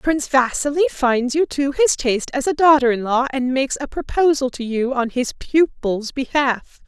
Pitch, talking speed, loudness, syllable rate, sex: 270 Hz, 190 wpm, -19 LUFS, 4.8 syllables/s, female